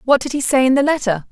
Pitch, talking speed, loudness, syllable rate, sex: 260 Hz, 320 wpm, -16 LUFS, 6.8 syllables/s, female